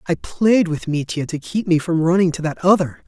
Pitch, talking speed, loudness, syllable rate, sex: 170 Hz, 235 wpm, -18 LUFS, 5.1 syllables/s, male